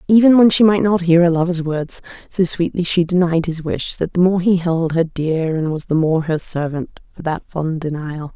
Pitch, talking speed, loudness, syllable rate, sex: 170 Hz, 230 wpm, -17 LUFS, 4.9 syllables/s, female